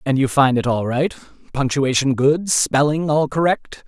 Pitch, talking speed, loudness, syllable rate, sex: 140 Hz, 155 wpm, -18 LUFS, 4.5 syllables/s, male